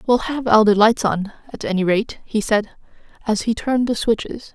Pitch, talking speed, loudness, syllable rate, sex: 220 Hz, 210 wpm, -19 LUFS, 5.2 syllables/s, female